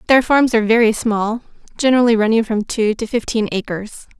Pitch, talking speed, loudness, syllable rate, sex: 225 Hz, 170 wpm, -16 LUFS, 5.7 syllables/s, female